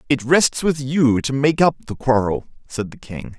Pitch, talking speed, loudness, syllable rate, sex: 135 Hz, 215 wpm, -19 LUFS, 4.5 syllables/s, male